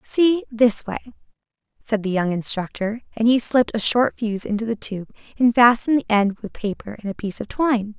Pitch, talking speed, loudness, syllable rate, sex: 225 Hz, 205 wpm, -20 LUFS, 5.7 syllables/s, female